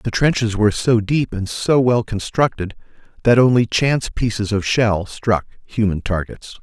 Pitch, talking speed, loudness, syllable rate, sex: 110 Hz, 165 wpm, -18 LUFS, 4.6 syllables/s, male